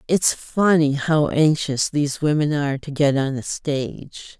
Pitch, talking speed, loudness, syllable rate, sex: 145 Hz, 165 wpm, -20 LUFS, 4.3 syllables/s, female